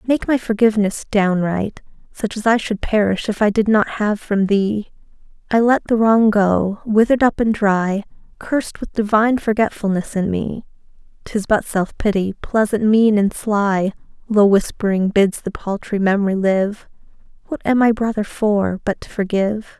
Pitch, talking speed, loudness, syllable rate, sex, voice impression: 210 Hz, 160 wpm, -18 LUFS, 4.6 syllables/s, female, very feminine, very middle-aged, very thin, tensed, slightly relaxed, powerful, slightly dark, soft, clear, fluent, cute, very cool, very intellectual, slightly refreshing, sincere, very calm, very friendly, reassuring, unique, elegant, slightly wild, slightly sweet, slightly lively, kind, modest, very light